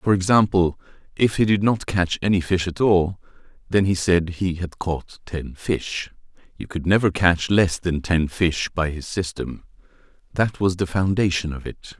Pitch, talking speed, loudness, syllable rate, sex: 90 Hz, 175 wpm, -22 LUFS, 4.4 syllables/s, male